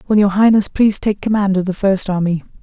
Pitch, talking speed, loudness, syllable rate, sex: 200 Hz, 230 wpm, -15 LUFS, 6.1 syllables/s, female